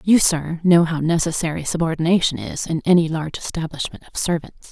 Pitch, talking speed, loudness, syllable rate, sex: 165 Hz, 165 wpm, -20 LUFS, 5.7 syllables/s, female